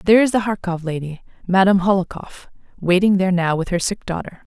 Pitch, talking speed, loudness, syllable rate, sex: 185 Hz, 185 wpm, -19 LUFS, 6.1 syllables/s, female